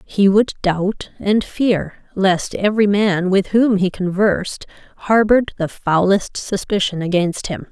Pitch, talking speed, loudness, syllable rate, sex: 195 Hz, 140 wpm, -17 LUFS, 4.0 syllables/s, female